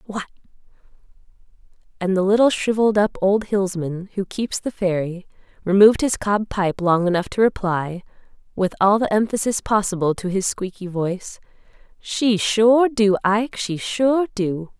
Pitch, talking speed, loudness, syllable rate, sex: 200 Hz, 145 wpm, -20 LUFS, 4.7 syllables/s, female